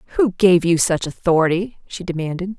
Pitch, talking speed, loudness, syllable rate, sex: 180 Hz, 160 wpm, -18 LUFS, 5.5 syllables/s, female